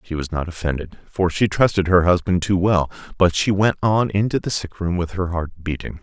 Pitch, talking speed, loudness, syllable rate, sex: 90 Hz, 230 wpm, -20 LUFS, 5.4 syllables/s, male